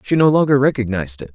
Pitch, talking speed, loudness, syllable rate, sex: 120 Hz, 225 wpm, -16 LUFS, 7.2 syllables/s, male